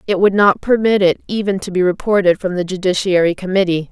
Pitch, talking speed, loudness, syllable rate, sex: 190 Hz, 200 wpm, -15 LUFS, 6.0 syllables/s, female